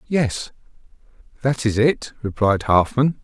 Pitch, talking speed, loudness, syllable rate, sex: 120 Hz, 110 wpm, -20 LUFS, 3.9 syllables/s, male